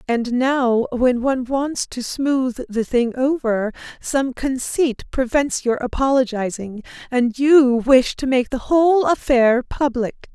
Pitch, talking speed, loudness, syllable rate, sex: 255 Hz, 140 wpm, -19 LUFS, 3.8 syllables/s, female